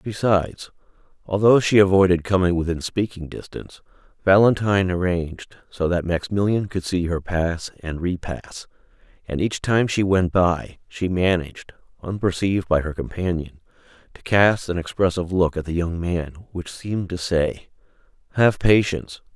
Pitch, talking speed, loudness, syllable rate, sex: 90 Hz, 145 wpm, -21 LUFS, 4.9 syllables/s, male